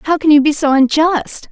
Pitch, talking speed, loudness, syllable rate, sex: 300 Hz, 235 wpm, -12 LUFS, 4.8 syllables/s, female